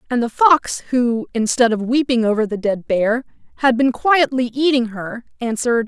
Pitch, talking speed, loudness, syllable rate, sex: 240 Hz, 175 wpm, -18 LUFS, 4.8 syllables/s, female